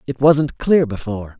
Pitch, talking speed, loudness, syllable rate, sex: 130 Hz, 170 wpm, -17 LUFS, 4.9 syllables/s, male